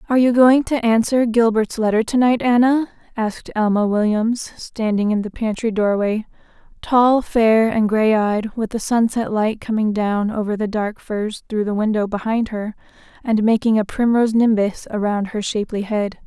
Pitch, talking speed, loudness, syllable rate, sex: 220 Hz, 170 wpm, -18 LUFS, 4.8 syllables/s, female